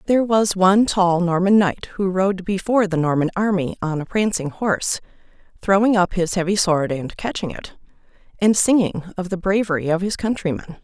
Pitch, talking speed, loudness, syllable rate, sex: 185 Hz, 175 wpm, -19 LUFS, 5.4 syllables/s, female